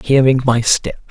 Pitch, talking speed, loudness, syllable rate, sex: 130 Hz, 165 wpm, -14 LUFS, 4.4 syllables/s, male